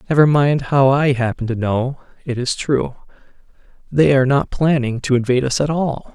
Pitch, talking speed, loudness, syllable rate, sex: 135 Hz, 185 wpm, -17 LUFS, 5.3 syllables/s, male